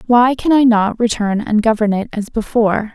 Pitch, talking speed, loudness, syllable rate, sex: 225 Hz, 205 wpm, -15 LUFS, 5.1 syllables/s, female